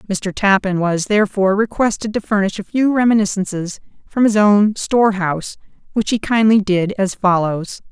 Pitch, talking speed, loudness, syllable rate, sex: 200 Hz, 160 wpm, -16 LUFS, 5.1 syllables/s, female